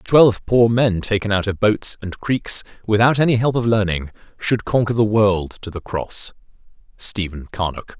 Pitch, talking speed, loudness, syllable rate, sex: 105 Hz, 175 wpm, -19 LUFS, 4.7 syllables/s, male